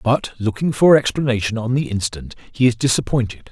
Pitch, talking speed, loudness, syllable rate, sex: 120 Hz, 170 wpm, -18 LUFS, 5.6 syllables/s, male